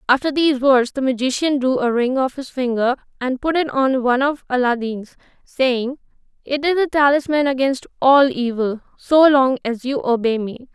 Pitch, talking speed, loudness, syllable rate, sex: 265 Hz, 180 wpm, -18 LUFS, 4.9 syllables/s, female